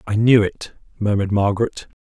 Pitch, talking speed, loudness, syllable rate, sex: 105 Hz, 150 wpm, -19 LUFS, 5.8 syllables/s, male